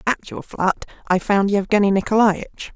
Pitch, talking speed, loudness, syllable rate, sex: 200 Hz, 155 wpm, -19 LUFS, 4.6 syllables/s, female